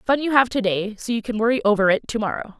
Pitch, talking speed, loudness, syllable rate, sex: 230 Hz, 300 wpm, -21 LUFS, 6.9 syllables/s, female